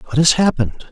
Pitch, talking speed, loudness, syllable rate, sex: 145 Hz, 195 wpm, -16 LUFS, 5.8 syllables/s, male